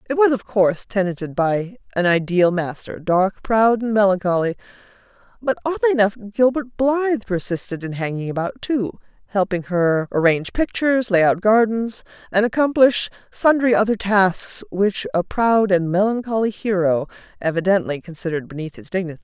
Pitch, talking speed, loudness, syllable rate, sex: 200 Hz, 145 wpm, -19 LUFS, 5.2 syllables/s, female